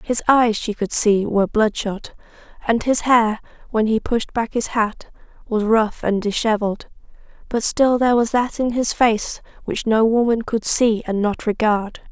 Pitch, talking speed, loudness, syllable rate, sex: 225 Hz, 180 wpm, -19 LUFS, 4.4 syllables/s, female